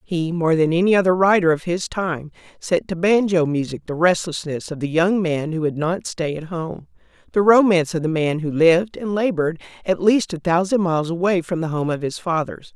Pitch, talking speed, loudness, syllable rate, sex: 170 Hz, 210 wpm, -20 LUFS, 5.4 syllables/s, female